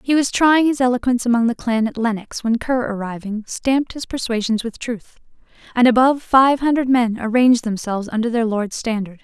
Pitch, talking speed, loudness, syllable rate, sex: 235 Hz, 190 wpm, -18 LUFS, 5.7 syllables/s, female